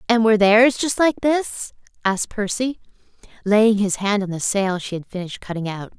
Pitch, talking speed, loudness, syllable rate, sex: 210 Hz, 190 wpm, -20 LUFS, 5.2 syllables/s, female